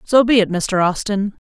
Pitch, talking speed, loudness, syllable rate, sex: 210 Hz, 205 wpm, -17 LUFS, 4.7 syllables/s, female